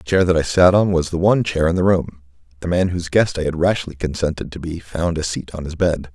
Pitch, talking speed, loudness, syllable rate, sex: 85 Hz, 285 wpm, -19 LUFS, 6.0 syllables/s, male